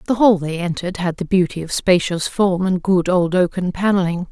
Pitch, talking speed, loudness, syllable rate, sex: 180 Hz, 210 wpm, -18 LUFS, 5.3 syllables/s, female